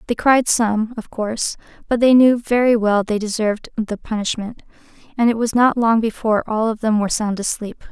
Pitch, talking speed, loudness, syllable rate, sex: 225 Hz, 195 wpm, -18 LUFS, 5.3 syllables/s, female